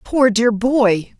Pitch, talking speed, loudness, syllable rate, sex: 230 Hz, 150 wpm, -15 LUFS, 2.8 syllables/s, female